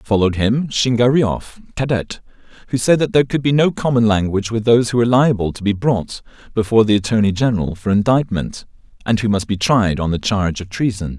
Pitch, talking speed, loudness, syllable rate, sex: 110 Hz, 200 wpm, -17 LUFS, 6.2 syllables/s, male